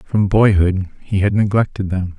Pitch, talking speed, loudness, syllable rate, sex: 100 Hz, 165 wpm, -17 LUFS, 4.5 syllables/s, male